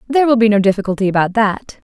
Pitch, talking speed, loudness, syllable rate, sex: 215 Hz, 220 wpm, -14 LUFS, 7.3 syllables/s, female